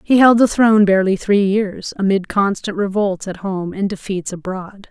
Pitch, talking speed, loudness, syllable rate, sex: 200 Hz, 185 wpm, -17 LUFS, 4.8 syllables/s, female